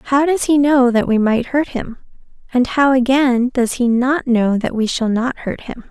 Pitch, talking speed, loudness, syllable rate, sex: 250 Hz, 225 wpm, -16 LUFS, 4.4 syllables/s, female